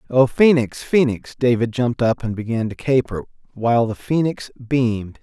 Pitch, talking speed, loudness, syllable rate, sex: 120 Hz, 160 wpm, -19 LUFS, 4.9 syllables/s, male